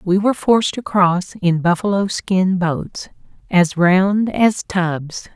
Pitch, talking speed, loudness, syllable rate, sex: 190 Hz, 135 wpm, -17 LUFS, 3.5 syllables/s, female